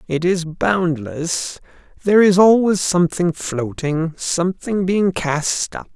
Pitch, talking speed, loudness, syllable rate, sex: 175 Hz, 120 wpm, -18 LUFS, 3.8 syllables/s, male